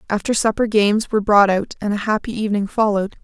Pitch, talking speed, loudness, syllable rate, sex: 210 Hz, 205 wpm, -18 LUFS, 6.8 syllables/s, female